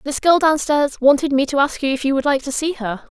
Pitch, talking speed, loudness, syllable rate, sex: 280 Hz, 305 wpm, -18 LUFS, 5.7 syllables/s, female